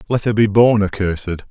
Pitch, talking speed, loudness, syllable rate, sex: 100 Hz, 200 wpm, -16 LUFS, 6.1 syllables/s, male